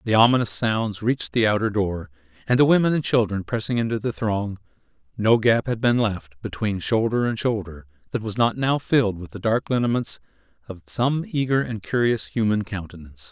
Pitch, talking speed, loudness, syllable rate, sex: 110 Hz, 185 wpm, -22 LUFS, 5.3 syllables/s, male